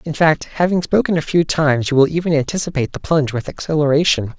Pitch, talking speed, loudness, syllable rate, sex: 155 Hz, 205 wpm, -17 LUFS, 6.5 syllables/s, male